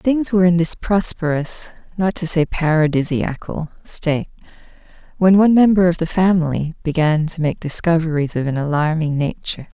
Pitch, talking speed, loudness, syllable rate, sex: 165 Hz, 145 wpm, -18 LUFS, 5.3 syllables/s, female